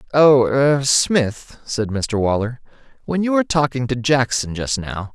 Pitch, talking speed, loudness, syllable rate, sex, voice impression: 130 Hz, 140 wpm, -18 LUFS, 4.1 syllables/s, male, masculine, adult-like, clear, slightly refreshing, sincere